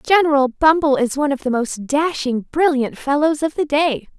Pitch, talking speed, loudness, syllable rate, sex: 285 Hz, 185 wpm, -18 LUFS, 5.0 syllables/s, female